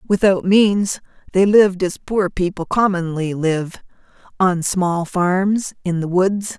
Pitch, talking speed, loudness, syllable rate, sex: 185 Hz, 135 wpm, -18 LUFS, 3.6 syllables/s, female